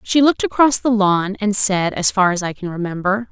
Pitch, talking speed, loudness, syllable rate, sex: 205 Hz, 235 wpm, -17 LUFS, 5.3 syllables/s, female